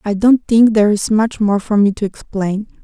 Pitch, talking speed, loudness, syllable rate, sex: 210 Hz, 235 wpm, -14 LUFS, 5.0 syllables/s, female